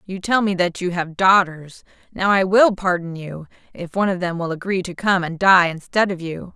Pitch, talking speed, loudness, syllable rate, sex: 180 Hz, 230 wpm, -19 LUFS, 5.1 syllables/s, female